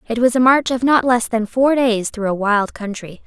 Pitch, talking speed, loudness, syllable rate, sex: 235 Hz, 255 wpm, -17 LUFS, 4.9 syllables/s, female